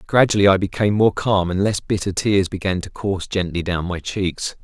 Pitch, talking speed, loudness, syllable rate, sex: 95 Hz, 205 wpm, -20 LUFS, 5.4 syllables/s, male